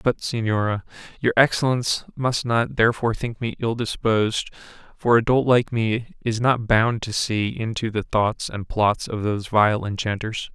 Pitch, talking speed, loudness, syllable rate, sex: 115 Hz, 170 wpm, -22 LUFS, 4.7 syllables/s, male